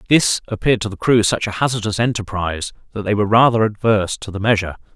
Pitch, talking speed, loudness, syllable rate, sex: 105 Hz, 205 wpm, -18 LUFS, 6.9 syllables/s, male